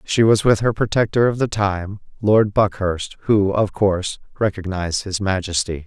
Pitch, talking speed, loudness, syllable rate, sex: 100 Hz, 165 wpm, -19 LUFS, 4.7 syllables/s, male